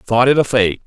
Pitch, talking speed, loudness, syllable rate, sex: 120 Hz, 280 wpm, -14 LUFS, 5.0 syllables/s, male